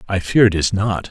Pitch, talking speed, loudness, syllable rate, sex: 100 Hz, 270 wpm, -16 LUFS, 5.4 syllables/s, male